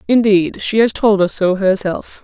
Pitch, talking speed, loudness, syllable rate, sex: 200 Hz, 190 wpm, -15 LUFS, 4.4 syllables/s, female